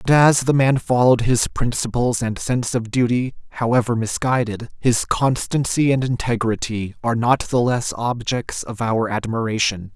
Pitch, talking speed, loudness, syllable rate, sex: 120 Hz, 150 wpm, -20 LUFS, 4.8 syllables/s, male